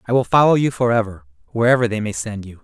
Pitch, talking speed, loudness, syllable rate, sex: 110 Hz, 250 wpm, -18 LUFS, 6.7 syllables/s, male